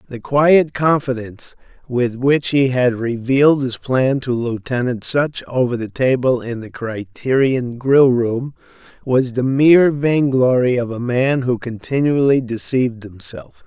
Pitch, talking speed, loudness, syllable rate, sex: 130 Hz, 140 wpm, -17 LUFS, 4.1 syllables/s, male